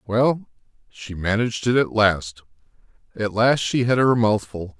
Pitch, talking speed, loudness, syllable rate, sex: 110 Hz, 150 wpm, -20 LUFS, 4.3 syllables/s, male